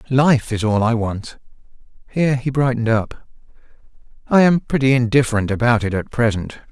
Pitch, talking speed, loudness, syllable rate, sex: 120 Hz, 150 wpm, -18 LUFS, 5.6 syllables/s, male